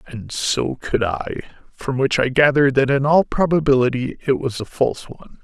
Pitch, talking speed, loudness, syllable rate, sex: 135 Hz, 175 wpm, -19 LUFS, 5.3 syllables/s, male